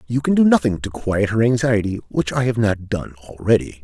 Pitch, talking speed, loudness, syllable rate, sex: 105 Hz, 220 wpm, -19 LUFS, 5.7 syllables/s, male